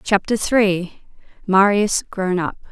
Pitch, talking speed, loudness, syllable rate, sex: 195 Hz, 90 wpm, -18 LUFS, 3.3 syllables/s, female